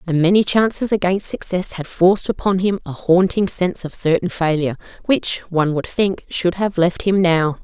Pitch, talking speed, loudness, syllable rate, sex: 180 Hz, 190 wpm, -18 LUFS, 5.2 syllables/s, female